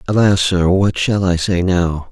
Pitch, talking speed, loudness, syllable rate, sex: 90 Hz, 200 wpm, -15 LUFS, 4.1 syllables/s, male